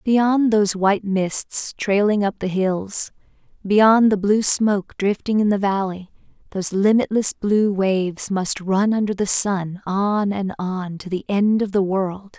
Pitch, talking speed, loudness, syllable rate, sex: 200 Hz, 165 wpm, -20 LUFS, 4.0 syllables/s, female